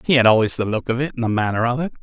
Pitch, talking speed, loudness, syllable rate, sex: 120 Hz, 355 wpm, -19 LUFS, 7.7 syllables/s, male